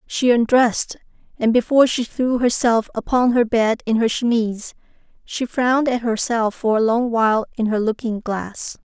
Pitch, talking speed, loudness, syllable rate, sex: 230 Hz, 170 wpm, -19 LUFS, 4.9 syllables/s, female